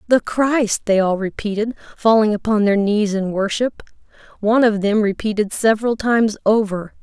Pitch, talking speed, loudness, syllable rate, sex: 215 Hz, 155 wpm, -18 LUFS, 5.1 syllables/s, female